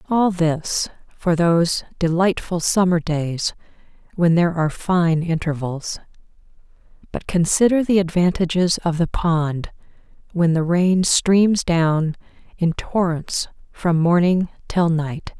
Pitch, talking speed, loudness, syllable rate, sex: 170 Hz, 115 wpm, -19 LUFS, 3.9 syllables/s, female